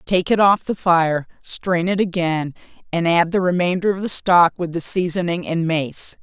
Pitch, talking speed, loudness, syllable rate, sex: 175 Hz, 195 wpm, -19 LUFS, 4.5 syllables/s, female